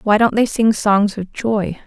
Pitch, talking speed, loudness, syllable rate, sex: 210 Hz, 225 wpm, -17 LUFS, 4.1 syllables/s, female